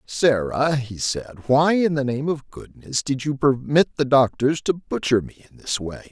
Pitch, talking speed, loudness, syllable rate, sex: 130 Hz, 195 wpm, -21 LUFS, 4.7 syllables/s, male